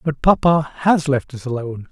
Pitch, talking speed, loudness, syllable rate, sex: 145 Hz, 190 wpm, -18 LUFS, 5.0 syllables/s, male